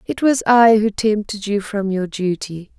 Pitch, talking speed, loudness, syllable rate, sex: 210 Hz, 195 wpm, -17 LUFS, 4.3 syllables/s, female